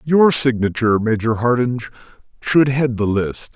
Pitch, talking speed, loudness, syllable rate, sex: 120 Hz, 135 wpm, -17 LUFS, 4.9 syllables/s, male